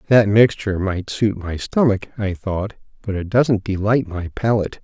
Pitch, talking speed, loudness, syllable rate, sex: 105 Hz, 175 wpm, -19 LUFS, 4.7 syllables/s, male